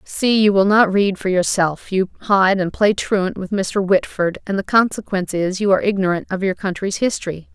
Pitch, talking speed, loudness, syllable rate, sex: 195 Hz, 205 wpm, -18 LUFS, 5.2 syllables/s, female